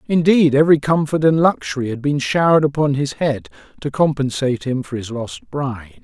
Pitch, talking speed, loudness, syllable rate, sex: 140 Hz, 180 wpm, -18 LUFS, 5.6 syllables/s, male